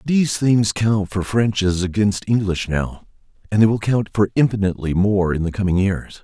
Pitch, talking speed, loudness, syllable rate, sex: 100 Hz, 190 wpm, -19 LUFS, 5.0 syllables/s, male